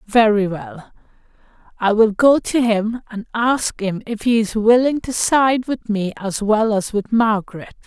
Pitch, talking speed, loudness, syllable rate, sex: 220 Hz, 175 wpm, -18 LUFS, 4.1 syllables/s, female